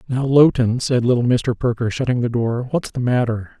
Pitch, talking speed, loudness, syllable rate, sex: 125 Hz, 185 wpm, -18 LUFS, 5.1 syllables/s, male